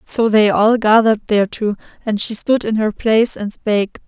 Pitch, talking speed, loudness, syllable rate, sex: 215 Hz, 190 wpm, -16 LUFS, 5.2 syllables/s, female